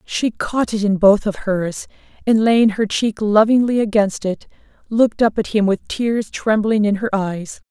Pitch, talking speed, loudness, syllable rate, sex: 210 Hz, 185 wpm, -17 LUFS, 4.3 syllables/s, female